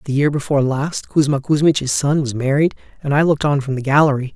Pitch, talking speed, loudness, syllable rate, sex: 140 Hz, 220 wpm, -17 LUFS, 6.1 syllables/s, male